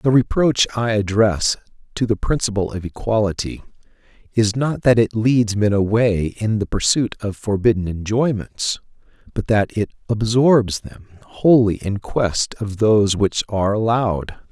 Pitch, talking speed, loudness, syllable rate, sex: 110 Hz, 145 wpm, -19 LUFS, 4.4 syllables/s, male